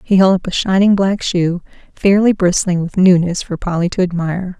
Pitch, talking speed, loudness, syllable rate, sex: 185 Hz, 195 wpm, -15 LUFS, 5.2 syllables/s, female